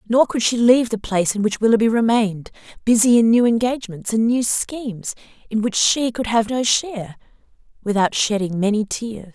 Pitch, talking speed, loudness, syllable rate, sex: 220 Hz, 180 wpm, -18 LUFS, 5.5 syllables/s, female